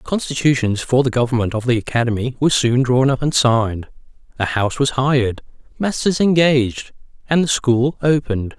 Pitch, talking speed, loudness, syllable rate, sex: 130 Hz, 170 wpm, -17 LUFS, 5.6 syllables/s, male